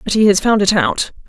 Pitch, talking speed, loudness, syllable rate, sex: 205 Hz, 280 wpm, -14 LUFS, 5.7 syllables/s, female